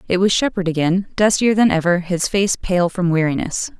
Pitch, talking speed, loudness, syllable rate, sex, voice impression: 185 Hz, 190 wpm, -17 LUFS, 5.2 syllables/s, female, feminine, adult-like, tensed, powerful, slightly hard, clear, fluent, slightly raspy, intellectual, calm, friendly, elegant, lively, slightly sharp